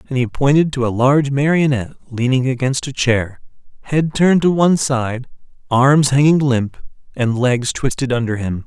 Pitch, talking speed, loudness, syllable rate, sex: 130 Hz, 165 wpm, -16 LUFS, 5.1 syllables/s, male